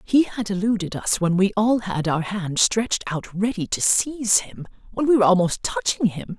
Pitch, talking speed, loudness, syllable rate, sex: 200 Hz, 195 wpm, -21 LUFS, 5.0 syllables/s, female